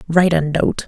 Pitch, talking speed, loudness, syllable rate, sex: 165 Hz, 205 wpm, -17 LUFS, 5.6 syllables/s, female